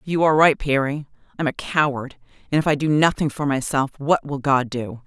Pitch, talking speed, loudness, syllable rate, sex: 140 Hz, 225 wpm, -20 LUFS, 5.7 syllables/s, female